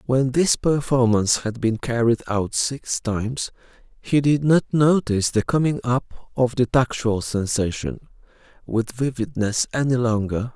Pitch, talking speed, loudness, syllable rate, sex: 120 Hz, 135 wpm, -21 LUFS, 4.4 syllables/s, male